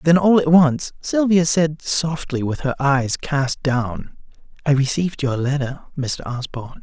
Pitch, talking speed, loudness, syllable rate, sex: 145 Hz, 160 wpm, -19 LUFS, 4.2 syllables/s, male